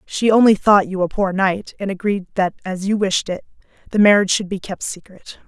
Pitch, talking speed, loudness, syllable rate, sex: 195 Hz, 220 wpm, -18 LUFS, 5.4 syllables/s, female